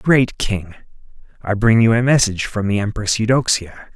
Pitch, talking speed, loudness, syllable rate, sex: 110 Hz, 165 wpm, -17 LUFS, 4.9 syllables/s, male